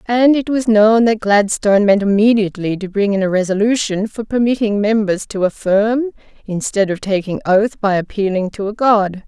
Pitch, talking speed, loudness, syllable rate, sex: 210 Hz, 175 wpm, -15 LUFS, 5.1 syllables/s, female